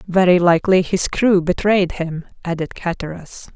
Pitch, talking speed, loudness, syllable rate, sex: 180 Hz, 135 wpm, -17 LUFS, 4.8 syllables/s, female